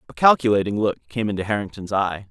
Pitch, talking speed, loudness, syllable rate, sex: 105 Hz, 180 wpm, -21 LUFS, 6.2 syllables/s, male